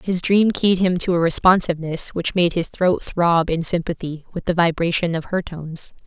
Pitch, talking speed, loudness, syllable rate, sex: 170 Hz, 200 wpm, -19 LUFS, 5.0 syllables/s, female